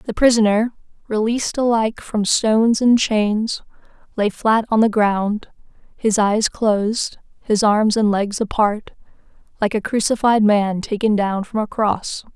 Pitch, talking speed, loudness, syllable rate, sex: 215 Hz, 145 wpm, -18 LUFS, 4.2 syllables/s, female